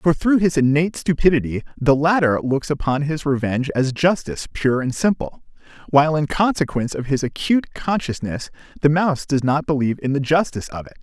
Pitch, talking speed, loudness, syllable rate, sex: 145 Hz, 180 wpm, -20 LUFS, 5.9 syllables/s, male